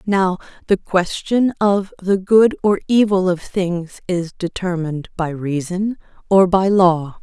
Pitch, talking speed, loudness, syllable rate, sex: 185 Hz, 140 wpm, -18 LUFS, 3.8 syllables/s, female